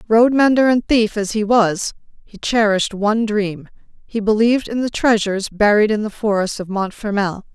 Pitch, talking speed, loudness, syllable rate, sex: 215 Hz, 175 wpm, -17 LUFS, 5.1 syllables/s, female